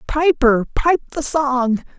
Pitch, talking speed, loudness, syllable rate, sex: 275 Hz, 120 wpm, -17 LUFS, 3.3 syllables/s, female